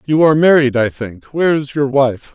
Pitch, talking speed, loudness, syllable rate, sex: 140 Hz, 230 wpm, -14 LUFS, 5.3 syllables/s, male